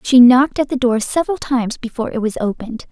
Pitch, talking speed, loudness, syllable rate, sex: 250 Hz, 225 wpm, -16 LUFS, 6.9 syllables/s, female